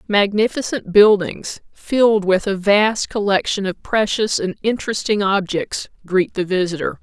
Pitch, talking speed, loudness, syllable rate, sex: 200 Hz, 130 wpm, -18 LUFS, 4.4 syllables/s, female